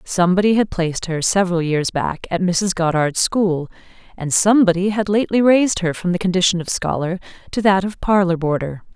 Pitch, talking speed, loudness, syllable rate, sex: 185 Hz, 180 wpm, -18 LUFS, 5.7 syllables/s, female